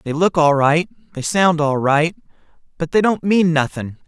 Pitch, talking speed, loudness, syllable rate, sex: 160 Hz, 190 wpm, -17 LUFS, 4.6 syllables/s, male